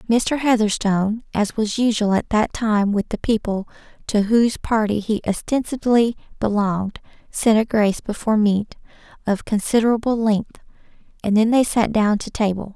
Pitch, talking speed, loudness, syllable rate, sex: 215 Hz, 150 wpm, -20 LUFS, 5.1 syllables/s, female